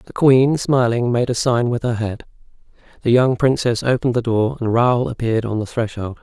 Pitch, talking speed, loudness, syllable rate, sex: 120 Hz, 205 wpm, -18 LUFS, 5.3 syllables/s, male